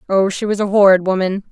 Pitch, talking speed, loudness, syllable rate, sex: 195 Hz, 235 wpm, -15 LUFS, 6.2 syllables/s, female